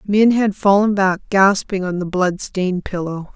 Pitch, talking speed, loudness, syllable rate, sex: 190 Hz, 180 wpm, -17 LUFS, 4.4 syllables/s, female